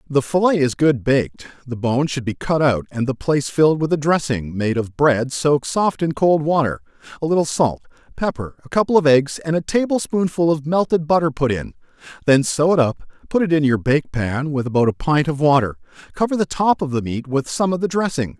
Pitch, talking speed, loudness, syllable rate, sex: 145 Hz, 225 wpm, -19 LUFS, 5.5 syllables/s, male